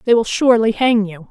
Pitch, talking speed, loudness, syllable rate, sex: 220 Hz, 230 wpm, -15 LUFS, 6.0 syllables/s, female